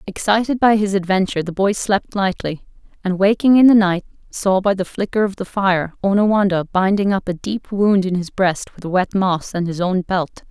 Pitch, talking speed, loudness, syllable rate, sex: 195 Hz, 205 wpm, -18 LUFS, 5.0 syllables/s, female